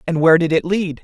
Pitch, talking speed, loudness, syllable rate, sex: 170 Hz, 290 wpm, -16 LUFS, 6.7 syllables/s, male